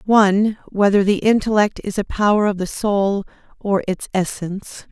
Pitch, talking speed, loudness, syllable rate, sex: 200 Hz, 160 wpm, -18 LUFS, 5.1 syllables/s, female